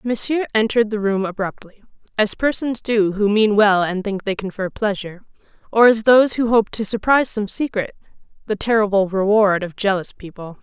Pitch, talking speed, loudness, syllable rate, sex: 210 Hz, 175 wpm, -18 LUFS, 5.4 syllables/s, female